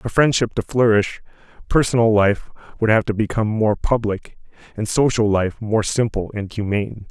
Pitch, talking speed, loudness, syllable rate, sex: 110 Hz, 160 wpm, -19 LUFS, 5.1 syllables/s, male